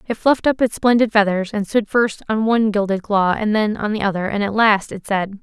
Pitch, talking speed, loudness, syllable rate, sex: 210 Hz, 255 wpm, -18 LUFS, 5.5 syllables/s, female